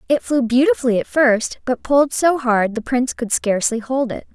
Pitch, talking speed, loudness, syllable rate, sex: 250 Hz, 205 wpm, -18 LUFS, 5.4 syllables/s, female